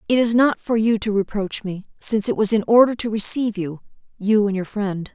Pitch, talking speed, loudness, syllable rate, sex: 210 Hz, 235 wpm, -20 LUFS, 5.5 syllables/s, female